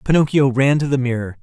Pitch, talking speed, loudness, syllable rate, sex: 135 Hz, 210 wpm, -17 LUFS, 6.1 syllables/s, male